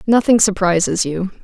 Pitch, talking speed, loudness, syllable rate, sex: 195 Hz, 125 wpm, -15 LUFS, 4.9 syllables/s, female